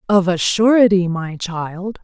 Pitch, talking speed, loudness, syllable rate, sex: 190 Hz, 145 wpm, -16 LUFS, 3.8 syllables/s, female